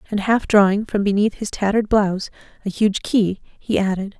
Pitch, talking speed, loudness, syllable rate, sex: 205 Hz, 185 wpm, -19 LUFS, 5.3 syllables/s, female